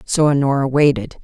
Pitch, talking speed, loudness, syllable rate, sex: 140 Hz, 145 wpm, -16 LUFS, 5.4 syllables/s, female